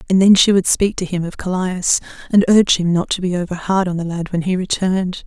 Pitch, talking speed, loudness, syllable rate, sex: 185 Hz, 260 wpm, -17 LUFS, 5.9 syllables/s, female